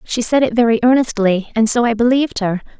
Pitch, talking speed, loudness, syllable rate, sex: 230 Hz, 215 wpm, -15 LUFS, 6.0 syllables/s, female